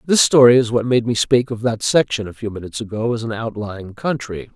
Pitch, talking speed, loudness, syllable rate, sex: 115 Hz, 235 wpm, -18 LUFS, 5.6 syllables/s, male